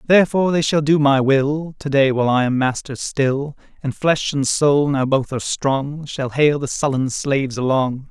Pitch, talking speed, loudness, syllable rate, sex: 140 Hz, 200 wpm, -18 LUFS, 4.7 syllables/s, male